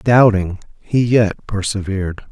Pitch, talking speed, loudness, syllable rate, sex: 100 Hz, 105 wpm, -17 LUFS, 3.9 syllables/s, male